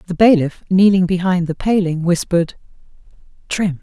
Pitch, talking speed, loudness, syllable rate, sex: 180 Hz, 125 wpm, -16 LUFS, 5.2 syllables/s, female